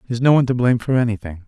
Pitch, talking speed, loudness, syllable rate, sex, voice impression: 115 Hz, 285 wpm, -17 LUFS, 8.4 syllables/s, male, very masculine, adult-like, dark, cool, slightly sincere, very calm, slightly kind